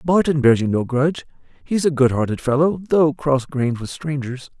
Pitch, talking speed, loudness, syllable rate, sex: 140 Hz, 195 wpm, -19 LUFS, 5.2 syllables/s, male